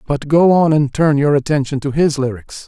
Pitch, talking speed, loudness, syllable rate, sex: 145 Hz, 225 wpm, -15 LUFS, 5.2 syllables/s, male